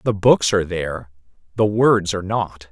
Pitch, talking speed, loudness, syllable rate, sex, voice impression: 100 Hz, 155 wpm, -19 LUFS, 5.2 syllables/s, male, very masculine, slightly middle-aged, very thick, tensed, powerful, slightly bright, very soft, slightly clear, fluent, raspy, very cool, intellectual, refreshing, sincere, very calm, very mature, very friendly, reassuring, unique, slightly elegant, wild, slightly sweet, lively, kind, slightly intense